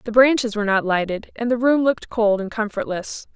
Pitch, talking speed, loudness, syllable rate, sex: 225 Hz, 215 wpm, -20 LUFS, 5.7 syllables/s, female